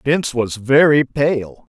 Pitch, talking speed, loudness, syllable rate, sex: 130 Hz, 135 wpm, -16 LUFS, 3.8 syllables/s, male